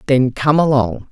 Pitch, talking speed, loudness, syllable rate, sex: 135 Hz, 160 wpm, -15 LUFS, 4.3 syllables/s, female